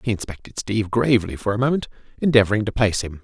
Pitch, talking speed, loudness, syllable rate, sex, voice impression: 110 Hz, 205 wpm, -21 LUFS, 7.5 syllables/s, male, very masculine, old, very thick, tensed, very powerful, dark, slightly soft, muffled, very fluent, raspy, cool, slightly intellectual, slightly sincere, calm, very mature, slightly friendly, slightly reassuring, slightly unique, elegant, very wild, sweet, lively, slightly kind, intense